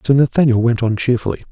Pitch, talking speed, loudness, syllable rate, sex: 120 Hz, 195 wpm, -15 LUFS, 6.8 syllables/s, male